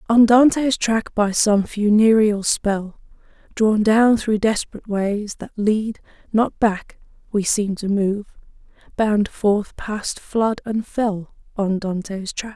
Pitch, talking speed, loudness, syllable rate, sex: 210 Hz, 140 wpm, -19 LUFS, 3.5 syllables/s, female